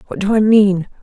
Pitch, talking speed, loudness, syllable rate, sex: 205 Hz, 235 wpm, -13 LUFS, 5.3 syllables/s, female